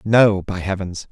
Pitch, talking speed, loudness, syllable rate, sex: 100 Hz, 160 wpm, -19 LUFS, 4.0 syllables/s, male